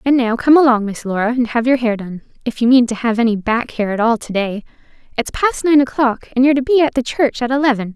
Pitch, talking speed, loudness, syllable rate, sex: 245 Hz, 270 wpm, -16 LUFS, 6.2 syllables/s, female